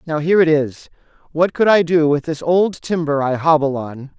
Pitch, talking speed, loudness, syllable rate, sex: 155 Hz, 215 wpm, -16 LUFS, 5.0 syllables/s, male